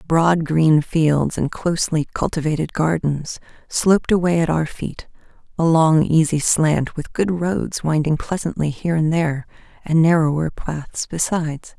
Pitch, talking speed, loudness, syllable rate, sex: 160 Hz, 150 wpm, -19 LUFS, 4.5 syllables/s, female